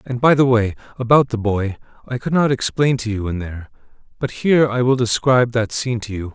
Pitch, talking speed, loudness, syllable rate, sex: 120 Hz, 225 wpm, -18 LUFS, 6.0 syllables/s, male